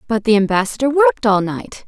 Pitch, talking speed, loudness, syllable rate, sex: 215 Hz, 190 wpm, -16 LUFS, 5.9 syllables/s, female